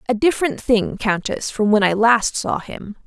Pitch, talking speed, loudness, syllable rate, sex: 220 Hz, 195 wpm, -18 LUFS, 4.6 syllables/s, female